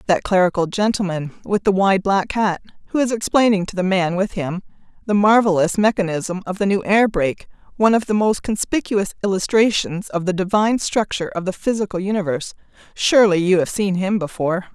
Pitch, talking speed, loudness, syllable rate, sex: 195 Hz, 180 wpm, -19 LUFS, 3.7 syllables/s, female